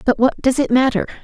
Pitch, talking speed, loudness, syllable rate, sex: 260 Hz, 245 wpm, -16 LUFS, 6.1 syllables/s, female